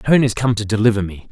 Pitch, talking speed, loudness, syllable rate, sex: 110 Hz, 275 wpm, -17 LUFS, 8.0 syllables/s, male